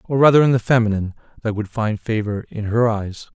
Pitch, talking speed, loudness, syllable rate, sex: 115 Hz, 215 wpm, -19 LUFS, 5.9 syllables/s, male